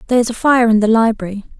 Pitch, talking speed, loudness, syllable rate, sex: 225 Hz, 265 wpm, -14 LUFS, 7.8 syllables/s, female